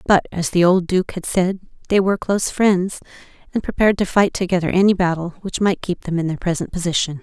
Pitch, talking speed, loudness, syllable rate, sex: 185 Hz, 215 wpm, -19 LUFS, 6.0 syllables/s, female